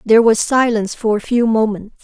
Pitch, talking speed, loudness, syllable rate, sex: 220 Hz, 205 wpm, -15 LUFS, 5.8 syllables/s, female